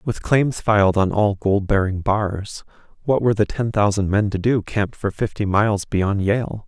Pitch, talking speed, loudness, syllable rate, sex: 105 Hz, 200 wpm, -20 LUFS, 4.7 syllables/s, male